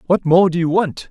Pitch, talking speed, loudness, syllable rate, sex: 175 Hz, 270 wpm, -15 LUFS, 5.3 syllables/s, male